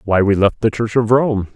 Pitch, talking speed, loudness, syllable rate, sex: 110 Hz, 270 wpm, -16 LUFS, 5.0 syllables/s, male